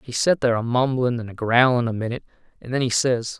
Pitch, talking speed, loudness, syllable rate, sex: 120 Hz, 245 wpm, -21 LUFS, 6.5 syllables/s, male